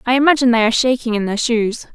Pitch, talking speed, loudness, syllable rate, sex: 240 Hz, 245 wpm, -16 LUFS, 7.3 syllables/s, female